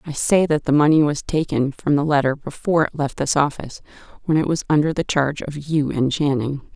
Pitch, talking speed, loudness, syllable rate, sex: 145 Hz, 220 wpm, -20 LUFS, 5.8 syllables/s, female